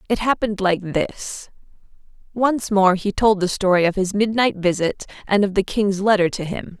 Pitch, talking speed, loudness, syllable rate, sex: 200 Hz, 185 wpm, -19 LUFS, 4.9 syllables/s, female